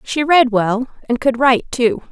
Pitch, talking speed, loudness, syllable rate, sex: 255 Hz, 200 wpm, -15 LUFS, 4.5 syllables/s, female